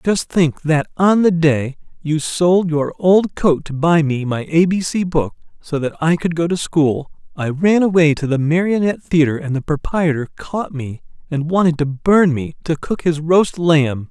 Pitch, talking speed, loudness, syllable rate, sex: 160 Hz, 205 wpm, -17 LUFS, 4.4 syllables/s, male